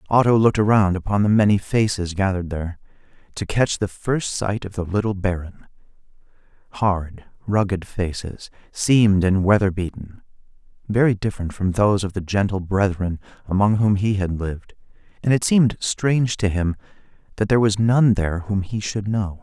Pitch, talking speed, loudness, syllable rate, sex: 100 Hz, 165 wpm, -20 LUFS, 5.3 syllables/s, male